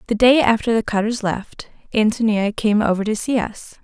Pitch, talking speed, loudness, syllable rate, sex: 220 Hz, 190 wpm, -19 LUFS, 5.1 syllables/s, female